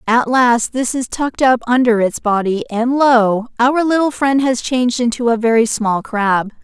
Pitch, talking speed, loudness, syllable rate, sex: 240 Hz, 190 wpm, -15 LUFS, 4.6 syllables/s, female